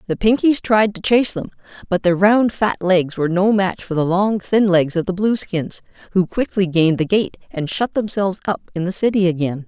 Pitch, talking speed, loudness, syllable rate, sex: 190 Hz, 215 wpm, -18 LUFS, 5.4 syllables/s, female